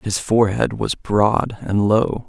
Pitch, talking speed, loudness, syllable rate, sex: 105 Hz, 160 wpm, -19 LUFS, 3.7 syllables/s, male